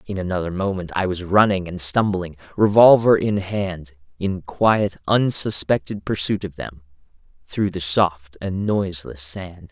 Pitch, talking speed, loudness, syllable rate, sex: 95 Hz, 140 wpm, -20 LUFS, 4.3 syllables/s, male